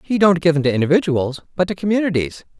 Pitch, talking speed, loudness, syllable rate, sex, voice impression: 170 Hz, 210 wpm, -18 LUFS, 6.7 syllables/s, male, masculine, slightly young, tensed, clear, intellectual, refreshing, calm